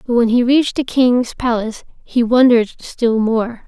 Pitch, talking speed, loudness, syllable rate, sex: 240 Hz, 180 wpm, -15 LUFS, 4.9 syllables/s, female